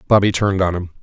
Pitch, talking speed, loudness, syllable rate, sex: 95 Hz, 235 wpm, -17 LUFS, 7.7 syllables/s, male